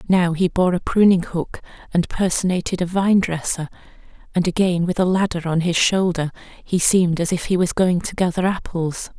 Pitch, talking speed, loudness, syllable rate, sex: 180 Hz, 190 wpm, -19 LUFS, 5.1 syllables/s, female